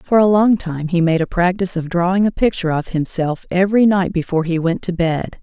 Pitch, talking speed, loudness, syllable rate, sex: 180 Hz, 230 wpm, -17 LUFS, 5.9 syllables/s, female